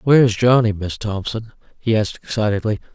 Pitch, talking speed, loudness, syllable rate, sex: 110 Hz, 145 wpm, -19 LUFS, 5.7 syllables/s, female